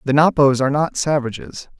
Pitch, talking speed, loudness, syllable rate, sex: 140 Hz, 165 wpm, -17 LUFS, 5.6 syllables/s, male